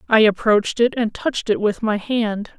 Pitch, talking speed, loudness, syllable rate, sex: 220 Hz, 210 wpm, -19 LUFS, 5.1 syllables/s, female